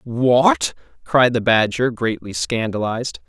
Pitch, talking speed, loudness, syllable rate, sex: 115 Hz, 110 wpm, -18 LUFS, 3.9 syllables/s, male